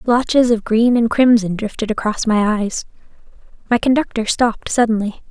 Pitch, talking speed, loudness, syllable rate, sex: 225 Hz, 145 wpm, -16 LUFS, 5.1 syllables/s, female